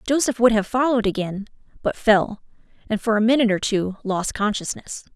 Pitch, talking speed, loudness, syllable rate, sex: 220 Hz, 175 wpm, -21 LUFS, 5.7 syllables/s, female